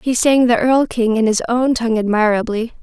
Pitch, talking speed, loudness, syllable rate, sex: 235 Hz, 210 wpm, -15 LUFS, 5.4 syllables/s, female